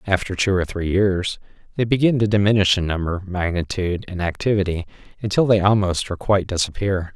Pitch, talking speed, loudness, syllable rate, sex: 95 Hz, 170 wpm, -20 LUFS, 5.8 syllables/s, male